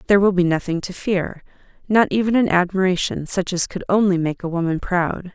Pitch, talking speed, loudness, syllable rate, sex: 185 Hz, 200 wpm, -19 LUFS, 5.6 syllables/s, female